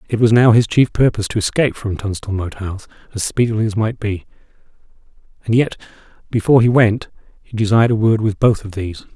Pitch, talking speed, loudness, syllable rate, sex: 110 Hz, 195 wpm, -16 LUFS, 6.5 syllables/s, male